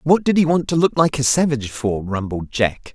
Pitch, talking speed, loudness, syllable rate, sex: 135 Hz, 245 wpm, -19 LUFS, 5.4 syllables/s, male